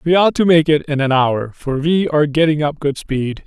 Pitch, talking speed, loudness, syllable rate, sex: 150 Hz, 260 wpm, -16 LUFS, 5.1 syllables/s, male